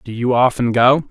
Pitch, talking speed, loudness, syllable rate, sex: 125 Hz, 215 wpm, -15 LUFS, 5.4 syllables/s, male